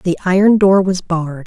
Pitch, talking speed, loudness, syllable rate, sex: 180 Hz, 205 wpm, -14 LUFS, 5.0 syllables/s, female